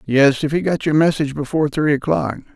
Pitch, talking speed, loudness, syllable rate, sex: 145 Hz, 210 wpm, -18 LUFS, 6.0 syllables/s, male